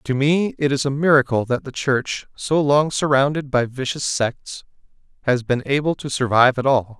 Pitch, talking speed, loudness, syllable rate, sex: 135 Hz, 190 wpm, -19 LUFS, 4.8 syllables/s, male